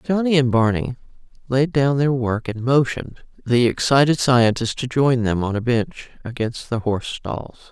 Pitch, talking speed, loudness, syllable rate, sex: 125 Hz, 170 wpm, -20 LUFS, 4.8 syllables/s, female